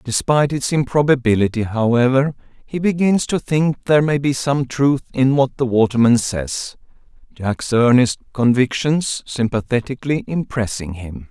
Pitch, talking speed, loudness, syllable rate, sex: 130 Hz, 120 wpm, -18 LUFS, 4.7 syllables/s, male